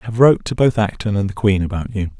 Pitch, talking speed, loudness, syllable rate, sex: 105 Hz, 300 wpm, -17 LUFS, 6.9 syllables/s, male